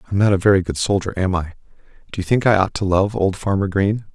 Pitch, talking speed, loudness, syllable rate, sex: 95 Hz, 260 wpm, -19 LUFS, 6.6 syllables/s, male